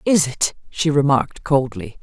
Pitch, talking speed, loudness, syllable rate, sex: 140 Hz, 150 wpm, -19 LUFS, 4.6 syllables/s, female